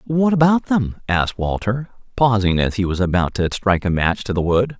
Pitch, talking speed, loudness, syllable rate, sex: 110 Hz, 215 wpm, -19 LUFS, 5.3 syllables/s, male